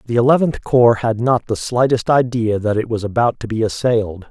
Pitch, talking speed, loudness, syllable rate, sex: 115 Hz, 210 wpm, -17 LUFS, 5.4 syllables/s, male